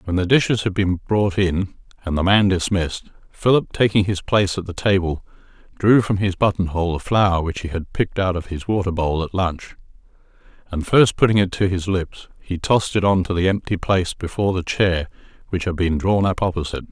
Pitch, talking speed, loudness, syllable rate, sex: 95 Hz, 215 wpm, -20 LUFS, 5.7 syllables/s, male